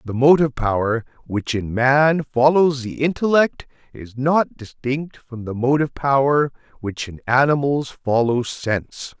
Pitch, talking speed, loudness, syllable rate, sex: 130 Hz, 145 wpm, -19 LUFS, 4.3 syllables/s, male